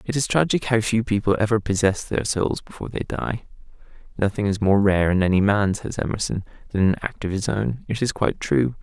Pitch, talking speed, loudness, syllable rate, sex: 105 Hz, 220 wpm, -22 LUFS, 5.6 syllables/s, male